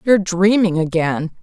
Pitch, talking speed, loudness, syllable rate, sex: 185 Hz, 125 wpm, -16 LUFS, 4.8 syllables/s, female